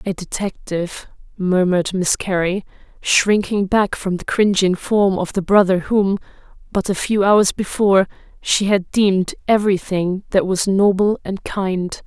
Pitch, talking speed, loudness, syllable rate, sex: 190 Hz, 150 wpm, -18 LUFS, 4.4 syllables/s, female